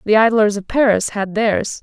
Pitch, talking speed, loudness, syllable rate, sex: 210 Hz, 195 wpm, -16 LUFS, 4.7 syllables/s, female